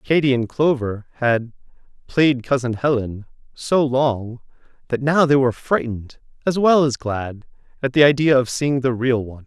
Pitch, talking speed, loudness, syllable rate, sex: 130 Hz, 165 wpm, -19 LUFS, 4.8 syllables/s, male